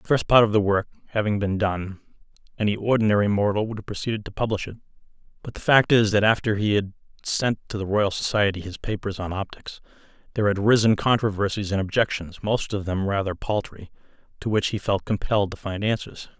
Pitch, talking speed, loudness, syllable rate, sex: 105 Hz, 200 wpm, -23 LUFS, 6.1 syllables/s, male